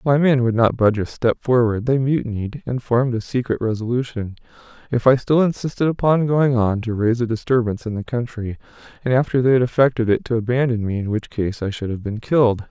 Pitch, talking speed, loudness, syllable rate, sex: 120 Hz, 210 wpm, -20 LUFS, 6.0 syllables/s, male